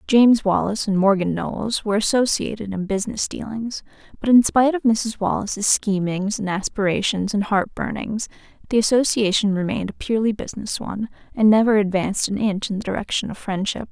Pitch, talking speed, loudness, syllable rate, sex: 210 Hz, 170 wpm, -21 LUFS, 5.9 syllables/s, female